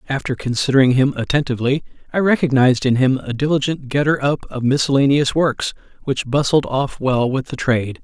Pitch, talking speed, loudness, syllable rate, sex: 135 Hz, 165 wpm, -18 LUFS, 5.8 syllables/s, male